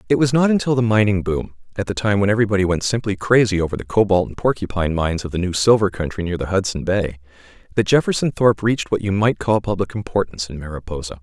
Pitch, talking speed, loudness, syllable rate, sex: 100 Hz, 225 wpm, -19 LUFS, 6.8 syllables/s, male